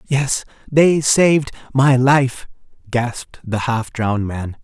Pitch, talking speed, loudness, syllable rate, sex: 130 Hz, 105 wpm, -17 LUFS, 3.7 syllables/s, male